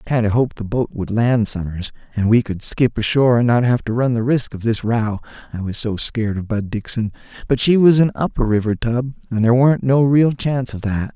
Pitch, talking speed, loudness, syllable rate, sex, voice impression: 120 Hz, 250 wpm, -18 LUFS, 5.7 syllables/s, male, masculine, slightly adult-like, slightly thick, tensed, slightly weak, bright, slightly soft, clear, slightly fluent, slightly raspy, cool, slightly intellectual, refreshing, sincere, slightly calm, friendly, reassuring, unique, slightly elegant, wild, slightly sweet, lively, slightly kind, slightly intense, slightly light